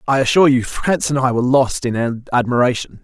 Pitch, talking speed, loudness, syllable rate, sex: 130 Hz, 200 wpm, -16 LUFS, 5.5 syllables/s, male